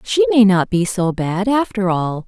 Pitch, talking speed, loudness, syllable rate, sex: 205 Hz, 210 wpm, -16 LUFS, 4.3 syllables/s, female